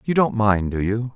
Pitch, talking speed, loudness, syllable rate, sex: 110 Hz, 260 wpm, -20 LUFS, 4.8 syllables/s, male